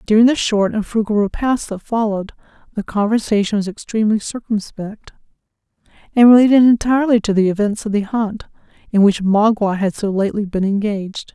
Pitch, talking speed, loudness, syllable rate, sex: 210 Hz, 160 wpm, -16 LUFS, 5.7 syllables/s, female